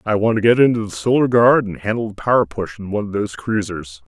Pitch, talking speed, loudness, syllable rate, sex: 105 Hz, 260 wpm, -18 LUFS, 6.3 syllables/s, male